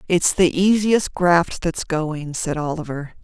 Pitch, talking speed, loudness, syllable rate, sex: 170 Hz, 150 wpm, -20 LUFS, 3.7 syllables/s, female